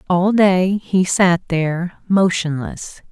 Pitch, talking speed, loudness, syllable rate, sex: 180 Hz, 115 wpm, -17 LUFS, 3.3 syllables/s, female